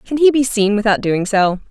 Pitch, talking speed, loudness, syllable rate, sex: 220 Hz, 245 wpm, -15 LUFS, 5.3 syllables/s, female